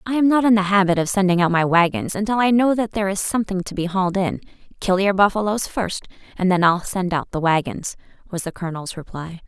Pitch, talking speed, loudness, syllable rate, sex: 190 Hz, 235 wpm, -20 LUFS, 6.2 syllables/s, female